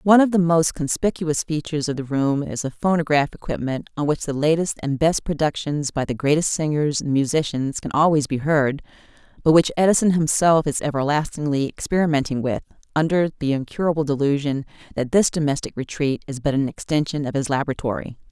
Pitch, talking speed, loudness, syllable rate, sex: 150 Hz, 175 wpm, -21 LUFS, 5.8 syllables/s, female